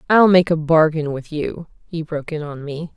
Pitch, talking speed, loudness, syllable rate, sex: 160 Hz, 225 wpm, -18 LUFS, 5.0 syllables/s, female